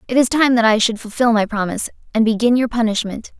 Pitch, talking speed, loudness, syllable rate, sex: 230 Hz, 230 wpm, -17 LUFS, 6.5 syllables/s, female